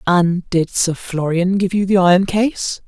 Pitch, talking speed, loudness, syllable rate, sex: 185 Hz, 190 wpm, -16 LUFS, 4.1 syllables/s, female